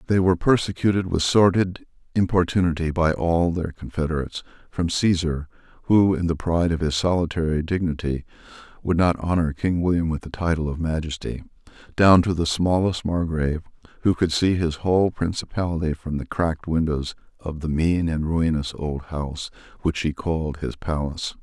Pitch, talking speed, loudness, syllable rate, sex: 85 Hz, 160 wpm, -23 LUFS, 5.4 syllables/s, male